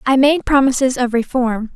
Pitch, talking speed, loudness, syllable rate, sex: 255 Hz, 170 wpm, -16 LUFS, 4.9 syllables/s, female